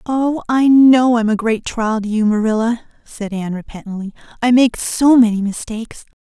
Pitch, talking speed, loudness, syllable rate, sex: 230 Hz, 175 wpm, -15 LUFS, 5.0 syllables/s, female